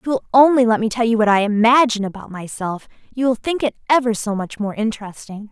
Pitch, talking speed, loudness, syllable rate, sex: 225 Hz, 220 wpm, -17 LUFS, 6.0 syllables/s, female